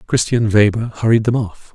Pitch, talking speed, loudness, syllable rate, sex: 110 Hz, 170 wpm, -16 LUFS, 5.0 syllables/s, male